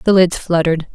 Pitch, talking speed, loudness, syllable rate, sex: 170 Hz, 190 wpm, -15 LUFS, 5.8 syllables/s, female